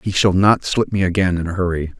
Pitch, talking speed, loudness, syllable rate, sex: 95 Hz, 270 wpm, -17 LUFS, 5.9 syllables/s, male